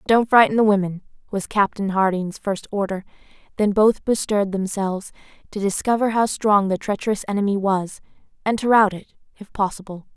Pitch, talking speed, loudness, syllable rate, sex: 205 Hz, 165 wpm, -20 LUFS, 5.5 syllables/s, female